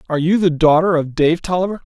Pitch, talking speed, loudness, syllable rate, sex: 165 Hz, 220 wpm, -16 LUFS, 6.7 syllables/s, male